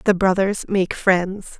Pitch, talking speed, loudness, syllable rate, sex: 190 Hz, 150 wpm, -19 LUFS, 3.5 syllables/s, female